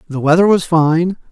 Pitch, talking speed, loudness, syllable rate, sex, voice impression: 165 Hz, 180 wpm, -13 LUFS, 4.7 syllables/s, male, masculine, adult-like, slightly tensed, slightly powerful, bright, soft, slightly raspy, slightly intellectual, calm, friendly, reassuring, lively, kind, slightly modest